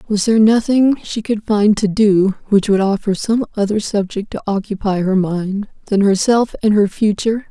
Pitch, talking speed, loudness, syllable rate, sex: 205 Hz, 185 wpm, -16 LUFS, 5.0 syllables/s, female